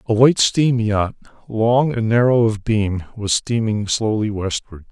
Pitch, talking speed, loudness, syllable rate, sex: 110 Hz, 160 wpm, -18 LUFS, 4.2 syllables/s, male